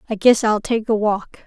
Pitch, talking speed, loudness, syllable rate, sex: 215 Hz, 245 wpm, -18 LUFS, 4.7 syllables/s, female